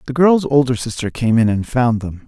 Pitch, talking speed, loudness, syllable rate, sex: 125 Hz, 235 wpm, -16 LUFS, 5.2 syllables/s, male